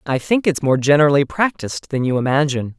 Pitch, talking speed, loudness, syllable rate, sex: 145 Hz, 195 wpm, -17 LUFS, 6.4 syllables/s, male